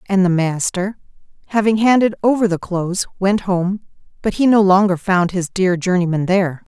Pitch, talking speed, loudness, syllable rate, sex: 190 Hz, 170 wpm, -17 LUFS, 5.2 syllables/s, female